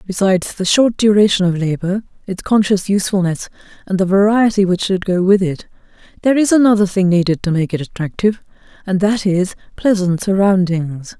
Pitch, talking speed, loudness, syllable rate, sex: 190 Hz, 165 wpm, -15 LUFS, 5.6 syllables/s, female